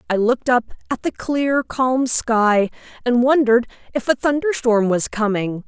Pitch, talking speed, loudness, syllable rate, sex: 245 Hz, 160 wpm, -19 LUFS, 4.6 syllables/s, female